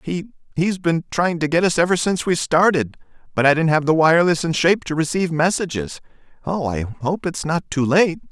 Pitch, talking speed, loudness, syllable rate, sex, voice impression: 160 Hz, 200 wpm, -19 LUFS, 5.6 syllables/s, male, masculine, adult-like, tensed, powerful, bright, clear, slightly nasal, intellectual, friendly, unique, wild, lively, slightly intense